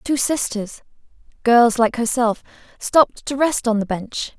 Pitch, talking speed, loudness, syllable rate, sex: 240 Hz, 150 wpm, -19 LUFS, 4.3 syllables/s, female